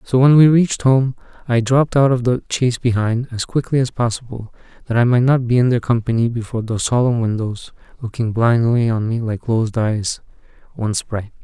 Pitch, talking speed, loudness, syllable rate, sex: 120 Hz, 195 wpm, -17 LUFS, 5.6 syllables/s, male